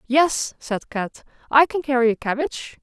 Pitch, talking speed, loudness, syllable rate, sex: 255 Hz, 170 wpm, -21 LUFS, 4.5 syllables/s, female